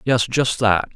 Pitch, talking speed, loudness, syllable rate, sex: 115 Hz, 190 wpm, -18 LUFS, 3.8 syllables/s, male